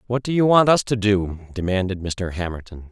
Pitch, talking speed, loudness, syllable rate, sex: 100 Hz, 205 wpm, -20 LUFS, 5.4 syllables/s, male